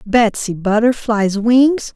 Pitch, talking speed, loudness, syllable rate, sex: 225 Hz, 90 wpm, -15 LUFS, 3.3 syllables/s, female